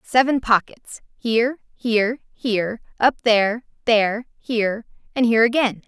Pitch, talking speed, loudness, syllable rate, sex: 230 Hz, 125 wpm, -20 LUFS, 4.9 syllables/s, female